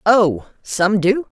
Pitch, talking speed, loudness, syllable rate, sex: 200 Hz, 130 wpm, -17 LUFS, 2.9 syllables/s, female